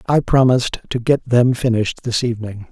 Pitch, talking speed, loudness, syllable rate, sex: 120 Hz, 175 wpm, -17 LUFS, 5.5 syllables/s, male